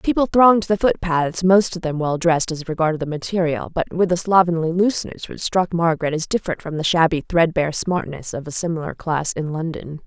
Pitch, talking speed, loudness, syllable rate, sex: 170 Hz, 205 wpm, -20 LUFS, 5.7 syllables/s, female